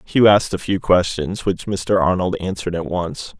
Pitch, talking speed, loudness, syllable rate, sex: 90 Hz, 195 wpm, -19 LUFS, 4.9 syllables/s, male